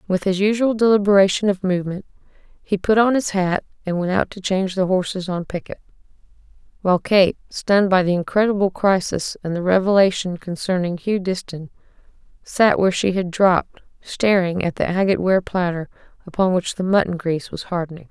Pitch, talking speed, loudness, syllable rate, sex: 190 Hz, 170 wpm, -19 LUFS, 5.7 syllables/s, female